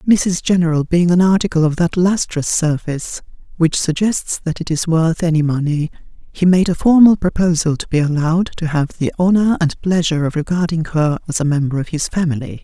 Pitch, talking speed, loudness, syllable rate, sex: 165 Hz, 190 wpm, -16 LUFS, 5.5 syllables/s, female